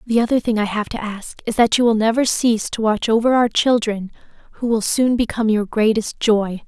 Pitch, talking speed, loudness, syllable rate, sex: 220 Hz, 225 wpm, -18 LUFS, 5.5 syllables/s, female